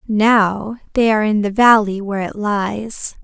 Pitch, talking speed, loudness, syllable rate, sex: 210 Hz, 165 wpm, -16 LUFS, 4.2 syllables/s, female